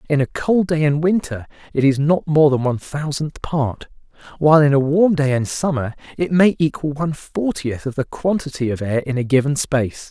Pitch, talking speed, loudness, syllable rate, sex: 145 Hz, 210 wpm, -18 LUFS, 5.3 syllables/s, male